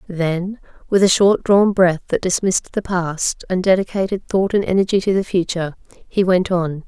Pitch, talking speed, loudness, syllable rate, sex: 185 Hz, 185 wpm, -18 LUFS, 4.9 syllables/s, female